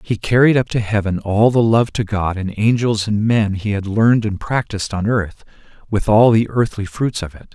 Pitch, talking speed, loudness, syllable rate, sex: 105 Hz, 225 wpm, -17 LUFS, 5.1 syllables/s, male